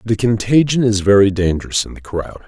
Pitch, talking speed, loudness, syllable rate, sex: 105 Hz, 195 wpm, -16 LUFS, 5.5 syllables/s, male